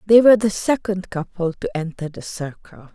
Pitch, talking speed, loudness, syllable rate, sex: 185 Hz, 185 wpm, -20 LUFS, 5.0 syllables/s, female